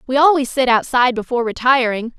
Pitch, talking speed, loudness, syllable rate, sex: 250 Hz, 165 wpm, -16 LUFS, 6.5 syllables/s, female